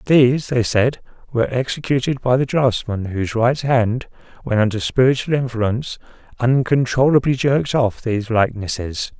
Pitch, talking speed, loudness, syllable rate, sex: 120 Hz, 130 wpm, -18 LUFS, 5.2 syllables/s, male